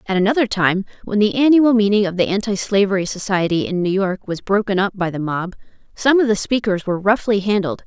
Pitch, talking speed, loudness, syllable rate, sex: 200 Hz, 215 wpm, -18 LUFS, 5.9 syllables/s, female